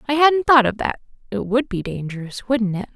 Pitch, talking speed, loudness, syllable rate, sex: 230 Hz, 205 wpm, -19 LUFS, 5.4 syllables/s, female